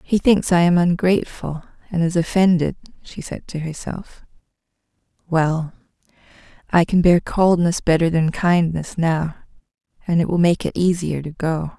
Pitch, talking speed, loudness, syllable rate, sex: 170 Hz, 150 wpm, -19 LUFS, 4.6 syllables/s, female